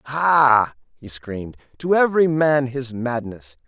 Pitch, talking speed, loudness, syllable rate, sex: 130 Hz, 130 wpm, -19 LUFS, 4.0 syllables/s, male